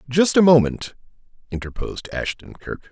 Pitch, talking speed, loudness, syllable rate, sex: 140 Hz, 125 wpm, -19 LUFS, 5.2 syllables/s, male